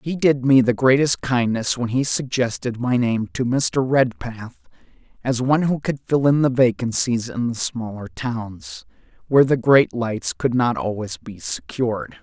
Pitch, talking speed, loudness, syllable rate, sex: 125 Hz, 170 wpm, -20 LUFS, 4.4 syllables/s, male